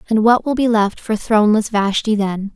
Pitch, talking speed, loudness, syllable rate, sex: 215 Hz, 210 wpm, -16 LUFS, 5.1 syllables/s, female